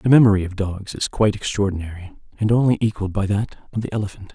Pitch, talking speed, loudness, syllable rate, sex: 100 Hz, 205 wpm, -21 LUFS, 6.8 syllables/s, male